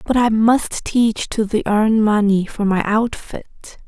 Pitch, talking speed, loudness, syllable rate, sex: 215 Hz, 170 wpm, -17 LUFS, 3.6 syllables/s, female